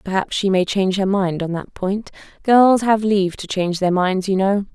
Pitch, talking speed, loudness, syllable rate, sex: 195 Hz, 230 wpm, -18 LUFS, 5.1 syllables/s, female